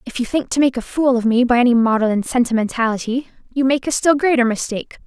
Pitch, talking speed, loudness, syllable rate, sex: 250 Hz, 225 wpm, -17 LUFS, 6.3 syllables/s, female